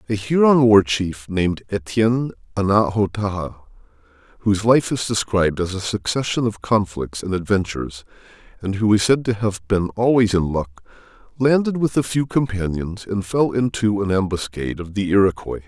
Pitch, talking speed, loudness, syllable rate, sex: 100 Hz, 155 wpm, -20 LUFS, 5.1 syllables/s, male